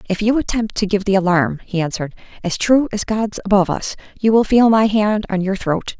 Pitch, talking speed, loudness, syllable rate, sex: 205 Hz, 230 wpm, -17 LUFS, 5.6 syllables/s, female